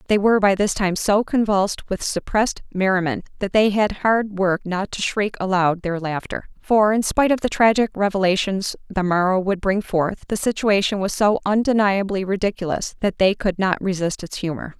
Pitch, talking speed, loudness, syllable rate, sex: 195 Hz, 185 wpm, -20 LUFS, 5.1 syllables/s, female